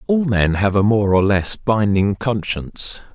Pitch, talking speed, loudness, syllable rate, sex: 105 Hz, 170 wpm, -18 LUFS, 4.2 syllables/s, male